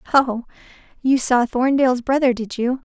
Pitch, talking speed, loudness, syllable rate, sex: 250 Hz, 145 wpm, -19 LUFS, 5.0 syllables/s, female